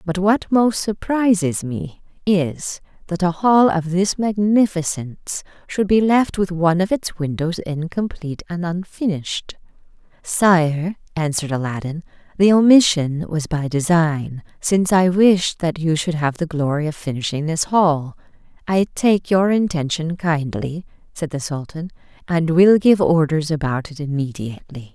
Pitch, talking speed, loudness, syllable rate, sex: 170 Hz, 140 wpm, -19 LUFS, 4.4 syllables/s, female